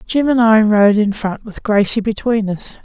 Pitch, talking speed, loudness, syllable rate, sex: 215 Hz, 210 wpm, -15 LUFS, 4.6 syllables/s, female